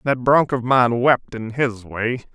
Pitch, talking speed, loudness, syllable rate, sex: 125 Hz, 205 wpm, -19 LUFS, 3.7 syllables/s, male